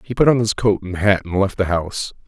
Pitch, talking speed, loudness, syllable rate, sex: 100 Hz, 290 wpm, -19 LUFS, 6.0 syllables/s, male